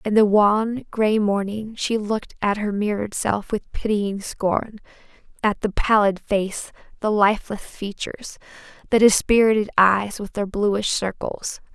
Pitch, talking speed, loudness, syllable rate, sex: 210 Hz, 140 wpm, -21 LUFS, 4.3 syllables/s, female